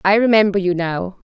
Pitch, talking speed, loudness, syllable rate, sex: 195 Hz, 190 wpm, -17 LUFS, 5.4 syllables/s, female